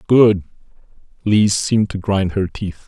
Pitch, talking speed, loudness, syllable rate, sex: 100 Hz, 145 wpm, -17 LUFS, 4.2 syllables/s, male